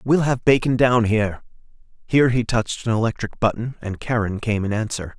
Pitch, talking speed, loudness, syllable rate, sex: 115 Hz, 185 wpm, -21 LUFS, 5.7 syllables/s, male